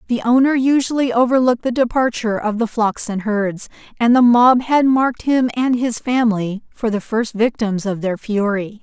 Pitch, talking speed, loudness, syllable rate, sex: 230 Hz, 185 wpm, -17 LUFS, 5.0 syllables/s, female